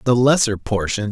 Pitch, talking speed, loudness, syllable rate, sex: 115 Hz, 160 wpm, -18 LUFS, 4.9 syllables/s, male